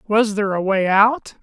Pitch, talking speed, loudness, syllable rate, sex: 210 Hz, 210 wpm, -17 LUFS, 4.7 syllables/s, male